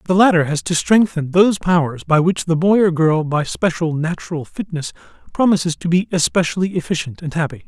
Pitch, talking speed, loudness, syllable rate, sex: 170 Hz, 190 wpm, -17 LUFS, 5.7 syllables/s, male